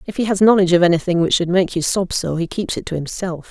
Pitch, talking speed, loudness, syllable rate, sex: 180 Hz, 290 wpm, -17 LUFS, 6.5 syllables/s, female